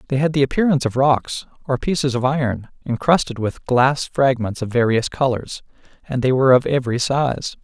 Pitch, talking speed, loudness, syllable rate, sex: 130 Hz, 180 wpm, -19 LUFS, 5.5 syllables/s, male